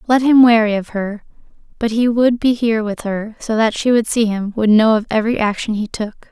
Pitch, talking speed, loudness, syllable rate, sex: 220 Hz, 240 wpm, -16 LUFS, 5.6 syllables/s, female